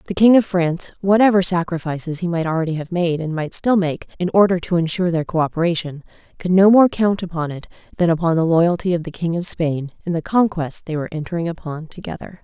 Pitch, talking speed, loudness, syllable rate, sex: 170 Hz, 210 wpm, -18 LUFS, 6.1 syllables/s, female